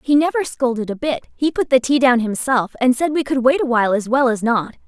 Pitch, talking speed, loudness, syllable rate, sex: 255 Hz, 260 wpm, -18 LUFS, 5.8 syllables/s, female